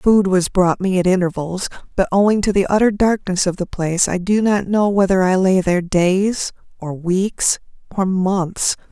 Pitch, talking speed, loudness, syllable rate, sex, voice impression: 190 Hz, 190 wpm, -17 LUFS, 4.6 syllables/s, female, feminine, adult-like, slightly relaxed, powerful, soft, raspy, calm, friendly, reassuring, elegant, slightly sharp